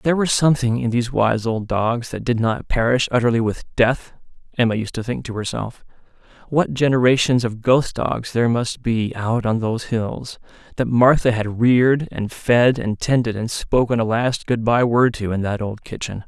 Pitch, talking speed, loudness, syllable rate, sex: 120 Hz, 200 wpm, -19 LUFS, 5.0 syllables/s, male